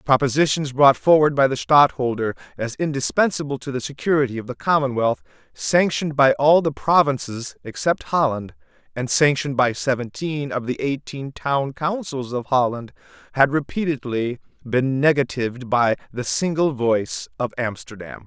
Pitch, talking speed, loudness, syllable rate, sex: 130 Hz, 140 wpm, -21 LUFS, 4.9 syllables/s, male